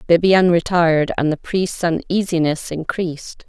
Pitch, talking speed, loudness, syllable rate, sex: 170 Hz, 120 wpm, -18 LUFS, 5.0 syllables/s, female